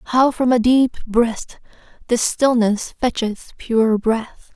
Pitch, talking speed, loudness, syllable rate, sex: 235 Hz, 130 wpm, -18 LUFS, 3.1 syllables/s, female